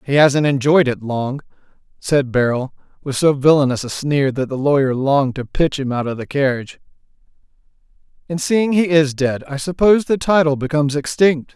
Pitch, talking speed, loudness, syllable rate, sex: 145 Hz, 175 wpm, -17 LUFS, 5.3 syllables/s, male